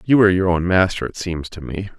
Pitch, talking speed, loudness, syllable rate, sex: 90 Hz, 270 wpm, -19 LUFS, 6.0 syllables/s, male